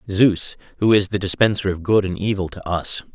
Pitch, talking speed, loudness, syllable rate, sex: 100 Hz, 210 wpm, -20 LUFS, 5.4 syllables/s, male